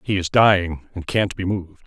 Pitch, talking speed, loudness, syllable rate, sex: 95 Hz, 225 wpm, -20 LUFS, 5.3 syllables/s, male